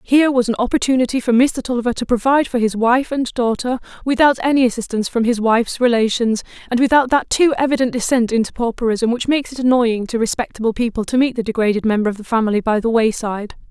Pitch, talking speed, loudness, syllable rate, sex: 240 Hz, 205 wpm, -17 LUFS, 6.6 syllables/s, female